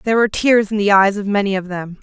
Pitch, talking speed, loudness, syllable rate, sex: 205 Hz, 295 wpm, -15 LUFS, 6.8 syllables/s, female